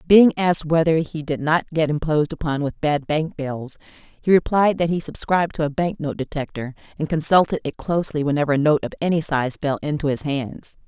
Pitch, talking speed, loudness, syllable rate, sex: 155 Hz, 205 wpm, -21 LUFS, 5.5 syllables/s, female